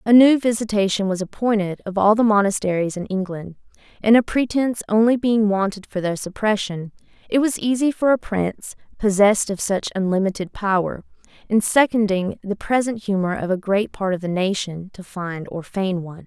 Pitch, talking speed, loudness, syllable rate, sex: 205 Hz, 175 wpm, -20 LUFS, 5.3 syllables/s, female